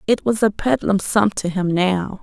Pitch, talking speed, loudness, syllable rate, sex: 200 Hz, 215 wpm, -19 LUFS, 4.4 syllables/s, female